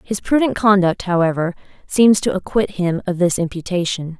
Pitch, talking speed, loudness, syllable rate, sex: 185 Hz, 155 wpm, -17 LUFS, 5.1 syllables/s, female